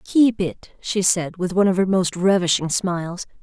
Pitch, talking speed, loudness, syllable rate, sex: 185 Hz, 195 wpm, -20 LUFS, 4.8 syllables/s, female